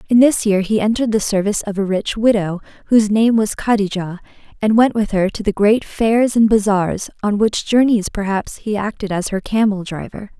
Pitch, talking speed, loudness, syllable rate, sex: 210 Hz, 200 wpm, -17 LUFS, 5.3 syllables/s, female